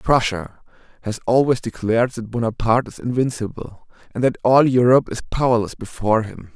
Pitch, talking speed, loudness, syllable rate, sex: 115 Hz, 145 wpm, -19 LUFS, 5.7 syllables/s, male